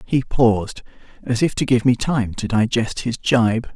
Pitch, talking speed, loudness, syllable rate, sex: 120 Hz, 175 wpm, -19 LUFS, 4.5 syllables/s, male